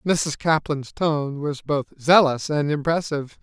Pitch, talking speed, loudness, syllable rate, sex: 150 Hz, 140 wpm, -22 LUFS, 3.9 syllables/s, male